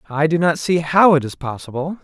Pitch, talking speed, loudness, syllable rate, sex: 155 Hz, 235 wpm, -17 LUFS, 5.6 syllables/s, male